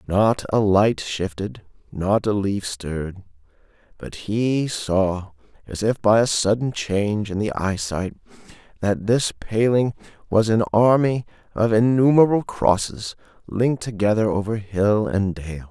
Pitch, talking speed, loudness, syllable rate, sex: 105 Hz, 135 wpm, -21 LUFS, 4.1 syllables/s, male